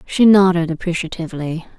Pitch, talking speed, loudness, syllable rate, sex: 175 Hz, 100 wpm, -17 LUFS, 5.7 syllables/s, female